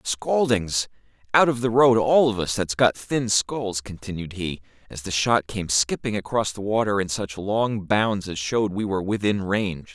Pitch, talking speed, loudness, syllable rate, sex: 105 Hz, 195 wpm, -23 LUFS, 4.6 syllables/s, male